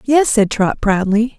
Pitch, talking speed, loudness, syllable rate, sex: 225 Hz, 175 wpm, -15 LUFS, 3.9 syllables/s, female